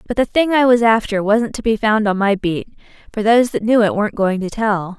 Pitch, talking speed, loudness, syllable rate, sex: 215 Hz, 265 wpm, -16 LUFS, 5.6 syllables/s, female